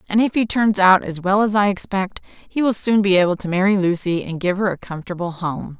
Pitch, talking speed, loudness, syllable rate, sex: 190 Hz, 250 wpm, -19 LUFS, 5.6 syllables/s, female